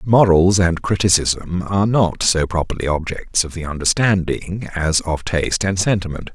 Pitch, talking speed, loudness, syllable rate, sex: 90 Hz, 150 wpm, -18 LUFS, 4.7 syllables/s, male